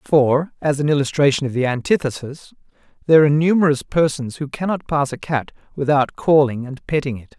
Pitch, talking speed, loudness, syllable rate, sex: 145 Hz, 170 wpm, -18 LUFS, 5.7 syllables/s, male